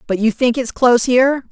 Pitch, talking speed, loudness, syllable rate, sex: 245 Hz, 240 wpm, -15 LUFS, 6.2 syllables/s, female